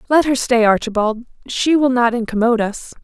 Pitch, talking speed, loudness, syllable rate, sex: 240 Hz, 180 wpm, -16 LUFS, 5.5 syllables/s, female